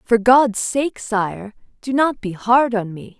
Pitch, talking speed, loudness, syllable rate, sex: 230 Hz, 190 wpm, -18 LUFS, 3.5 syllables/s, female